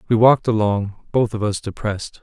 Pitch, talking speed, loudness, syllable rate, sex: 110 Hz, 190 wpm, -19 LUFS, 5.6 syllables/s, male